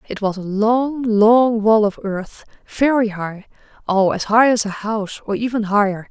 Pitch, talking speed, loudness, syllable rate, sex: 215 Hz, 175 wpm, -17 LUFS, 4.4 syllables/s, female